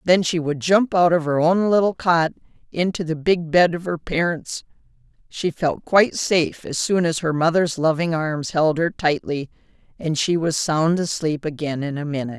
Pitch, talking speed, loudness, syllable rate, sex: 165 Hz, 195 wpm, -20 LUFS, 4.9 syllables/s, female